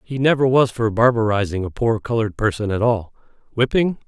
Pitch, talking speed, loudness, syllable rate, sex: 115 Hz, 175 wpm, -19 LUFS, 5.7 syllables/s, male